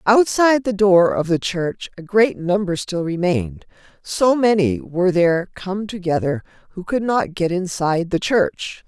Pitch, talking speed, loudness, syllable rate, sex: 190 Hz, 160 wpm, -19 LUFS, 4.5 syllables/s, female